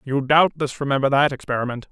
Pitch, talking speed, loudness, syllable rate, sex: 140 Hz, 155 wpm, -20 LUFS, 6.1 syllables/s, male